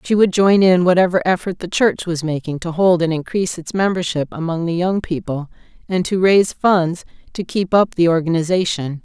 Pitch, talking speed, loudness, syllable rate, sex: 175 Hz, 190 wpm, -17 LUFS, 5.3 syllables/s, female